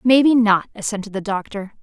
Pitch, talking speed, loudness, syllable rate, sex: 215 Hz, 165 wpm, -18 LUFS, 5.6 syllables/s, female